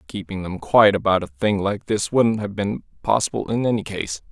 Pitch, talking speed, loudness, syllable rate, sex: 105 Hz, 210 wpm, -21 LUFS, 4.9 syllables/s, male